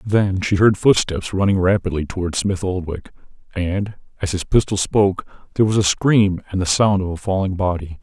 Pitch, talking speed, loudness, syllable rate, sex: 95 Hz, 185 wpm, -19 LUFS, 5.3 syllables/s, male